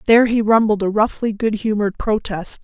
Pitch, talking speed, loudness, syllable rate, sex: 215 Hz, 185 wpm, -18 LUFS, 5.8 syllables/s, female